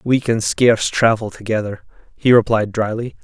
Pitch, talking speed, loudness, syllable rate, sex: 110 Hz, 150 wpm, -17 LUFS, 5.0 syllables/s, male